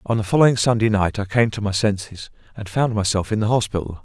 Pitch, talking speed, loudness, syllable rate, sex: 105 Hz, 240 wpm, -20 LUFS, 6.2 syllables/s, male